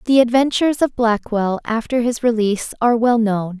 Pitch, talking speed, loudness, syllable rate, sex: 230 Hz, 165 wpm, -17 LUFS, 5.4 syllables/s, female